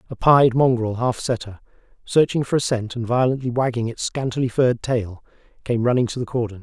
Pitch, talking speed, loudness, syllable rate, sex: 120 Hz, 190 wpm, -20 LUFS, 5.7 syllables/s, male